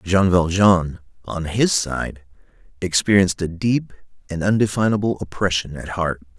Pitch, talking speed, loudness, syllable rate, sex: 90 Hz, 120 wpm, -20 LUFS, 4.6 syllables/s, male